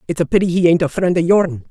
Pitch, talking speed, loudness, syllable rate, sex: 175 Hz, 315 wpm, -15 LUFS, 6.6 syllables/s, female